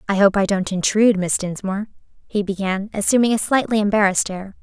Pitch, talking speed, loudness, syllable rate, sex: 200 Hz, 180 wpm, -19 LUFS, 6.3 syllables/s, female